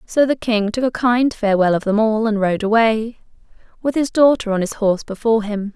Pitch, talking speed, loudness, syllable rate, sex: 220 Hz, 220 wpm, -17 LUFS, 5.5 syllables/s, female